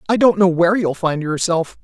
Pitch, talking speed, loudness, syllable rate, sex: 180 Hz, 230 wpm, -17 LUFS, 5.5 syllables/s, female